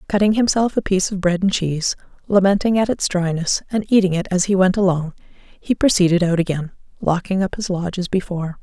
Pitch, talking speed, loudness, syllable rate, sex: 185 Hz, 200 wpm, -19 LUFS, 5.9 syllables/s, female